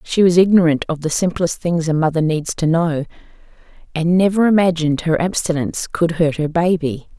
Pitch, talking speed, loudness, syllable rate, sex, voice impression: 165 Hz, 175 wpm, -17 LUFS, 5.4 syllables/s, female, feminine, adult-like, tensed, powerful, clear, slightly raspy, intellectual, slightly friendly, lively, slightly sharp